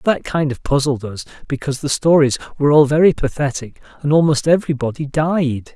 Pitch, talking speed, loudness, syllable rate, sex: 145 Hz, 165 wpm, -17 LUFS, 5.7 syllables/s, male